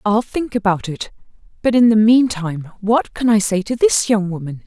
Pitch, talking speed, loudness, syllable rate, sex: 215 Hz, 205 wpm, -17 LUFS, 5.0 syllables/s, female